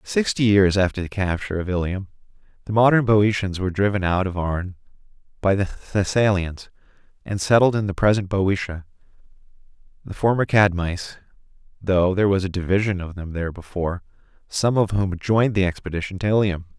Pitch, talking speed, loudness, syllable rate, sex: 95 Hz, 155 wpm, -21 LUFS, 5.8 syllables/s, male